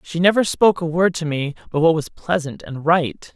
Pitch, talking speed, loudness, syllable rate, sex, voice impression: 165 Hz, 235 wpm, -19 LUFS, 5.2 syllables/s, male, masculine, very adult-like, thick, slightly tensed, slightly powerful, slightly dark, slightly soft, slightly muffled, slightly halting, cool, intellectual, very refreshing, very sincere, calm, slightly mature, friendly, reassuring, slightly unique, slightly elegant, wild, sweet, lively, kind, slightly modest